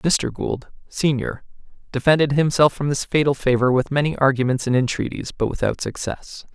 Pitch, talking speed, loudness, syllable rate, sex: 135 Hz, 155 wpm, -20 LUFS, 5.2 syllables/s, male